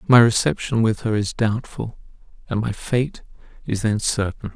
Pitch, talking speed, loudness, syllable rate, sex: 110 Hz, 160 wpm, -21 LUFS, 4.6 syllables/s, male